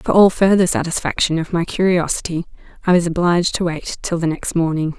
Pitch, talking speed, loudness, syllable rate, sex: 170 Hz, 195 wpm, -18 LUFS, 5.8 syllables/s, female